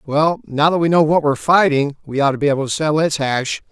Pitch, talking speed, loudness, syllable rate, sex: 150 Hz, 290 wpm, -16 LUFS, 6.5 syllables/s, male